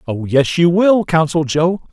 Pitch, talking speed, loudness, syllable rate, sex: 165 Hz, 190 wpm, -14 LUFS, 4.6 syllables/s, male